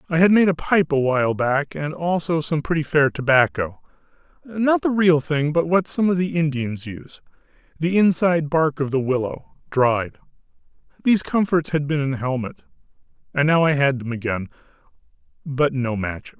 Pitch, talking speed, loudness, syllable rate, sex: 150 Hz, 175 wpm, -20 LUFS, 5.1 syllables/s, male